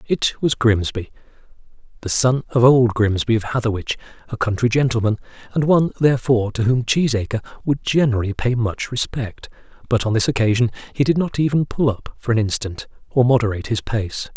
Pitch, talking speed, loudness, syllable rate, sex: 120 Hz, 170 wpm, -19 LUFS, 5.8 syllables/s, male